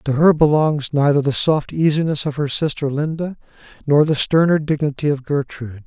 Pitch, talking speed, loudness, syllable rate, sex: 145 Hz, 175 wpm, -18 LUFS, 5.3 syllables/s, male